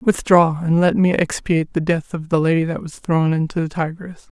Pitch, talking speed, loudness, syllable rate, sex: 165 Hz, 220 wpm, -18 LUFS, 5.2 syllables/s, male